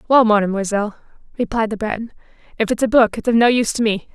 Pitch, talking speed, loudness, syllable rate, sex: 220 Hz, 215 wpm, -18 LUFS, 7.1 syllables/s, female